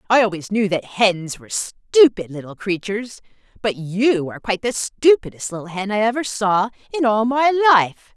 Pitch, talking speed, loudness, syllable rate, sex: 215 Hz, 175 wpm, -19 LUFS, 5.1 syllables/s, female